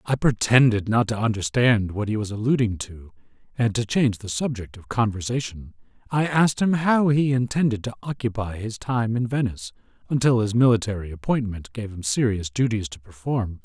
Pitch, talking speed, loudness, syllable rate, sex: 115 Hz, 170 wpm, -23 LUFS, 5.4 syllables/s, male